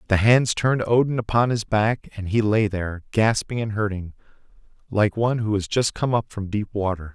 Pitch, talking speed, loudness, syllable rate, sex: 105 Hz, 200 wpm, -22 LUFS, 5.4 syllables/s, male